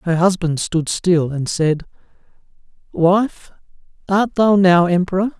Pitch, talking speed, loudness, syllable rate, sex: 180 Hz, 120 wpm, -17 LUFS, 3.9 syllables/s, male